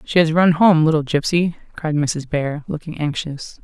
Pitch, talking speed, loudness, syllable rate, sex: 155 Hz, 180 wpm, -18 LUFS, 4.6 syllables/s, female